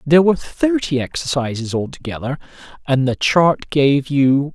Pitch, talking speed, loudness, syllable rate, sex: 145 Hz, 130 wpm, -17 LUFS, 4.8 syllables/s, male